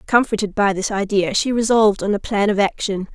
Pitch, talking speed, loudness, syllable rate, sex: 205 Hz, 210 wpm, -18 LUFS, 5.7 syllables/s, female